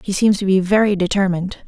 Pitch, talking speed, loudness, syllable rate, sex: 195 Hz, 215 wpm, -17 LUFS, 6.4 syllables/s, female